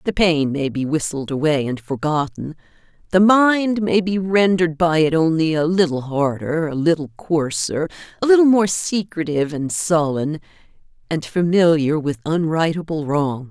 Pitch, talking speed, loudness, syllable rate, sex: 160 Hz, 145 wpm, -19 LUFS, 4.6 syllables/s, female